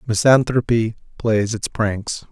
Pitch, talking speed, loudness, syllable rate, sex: 110 Hz, 105 wpm, -19 LUFS, 3.6 syllables/s, male